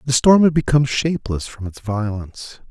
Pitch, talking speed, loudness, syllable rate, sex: 125 Hz, 180 wpm, -18 LUFS, 5.6 syllables/s, male